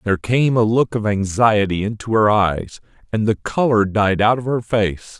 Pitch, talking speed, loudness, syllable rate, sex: 110 Hz, 195 wpm, -18 LUFS, 4.6 syllables/s, male